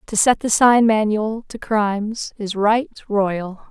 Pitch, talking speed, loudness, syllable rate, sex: 215 Hz, 160 wpm, -18 LUFS, 3.7 syllables/s, female